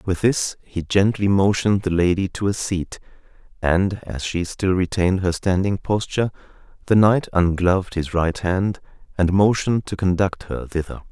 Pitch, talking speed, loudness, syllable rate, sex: 95 Hz, 160 wpm, -20 LUFS, 4.8 syllables/s, male